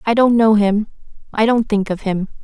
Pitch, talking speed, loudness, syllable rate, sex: 215 Hz, 220 wpm, -16 LUFS, 5.0 syllables/s, female